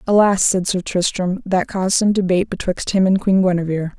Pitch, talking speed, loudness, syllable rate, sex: 190 Hz, 195 wpm, -17 LUFS, 5.5 syllables/s, female